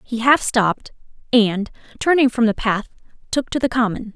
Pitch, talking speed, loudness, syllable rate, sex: 235 Hz, 175 wpm, -19 LUFS, 5.0 syllables/s, female